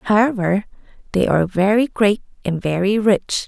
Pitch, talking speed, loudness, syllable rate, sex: 200 Hz, 140 wpm, -18 LUFS, 4.8 syllables/s, female